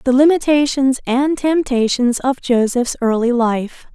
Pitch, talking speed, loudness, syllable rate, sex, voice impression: 255 Hz, 120 wpm, -16 LUFS, 4.0 syllables/s, female, feminine, slightly adult-like, soft, slightly cute, slightly calm, friendly, slightly reassuring, kind